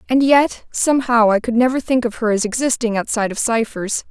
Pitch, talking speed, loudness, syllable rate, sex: 235 Hz, 205 wpm, -17 LUFS, 5.7 syllables/s, female